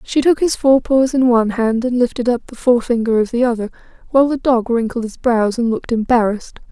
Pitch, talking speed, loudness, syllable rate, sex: 240 Hz, 225 wpm, -16 LUFS, 6.1 syllables/s, female